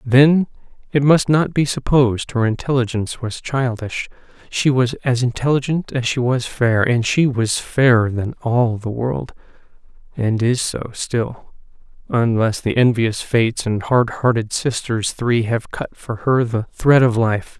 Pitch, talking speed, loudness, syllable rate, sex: 120 Hz, 160 wpm, -18 LUFS, 4.2 syllables/s, male